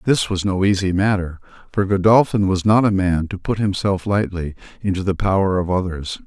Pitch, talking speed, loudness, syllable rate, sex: 95 Hz, 190 wpm, -19 LUFS, 5.3 syllables/s, male